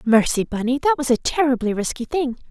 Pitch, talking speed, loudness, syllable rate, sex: 255 Hz, 190 wpm, -20 LUFS, 5.8 syllables/s, female